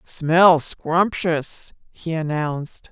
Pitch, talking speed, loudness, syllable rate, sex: 160 Hz, 80 wpm, -19 LUFS, 2.7 syllables/s, female